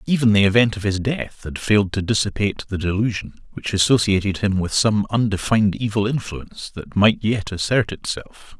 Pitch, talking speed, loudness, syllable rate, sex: 105 Hz, 175 wpm, -20 LUFS, 5.5 syllables/s, male